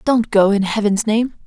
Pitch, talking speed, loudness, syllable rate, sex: 215 Hz, 205 wpm, -16 LUFS, 4.7 syllables/s, female